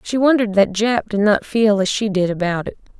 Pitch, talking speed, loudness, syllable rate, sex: 210 Hz, 240 wpm, -17 LUFS, 5.7 syllables/s, female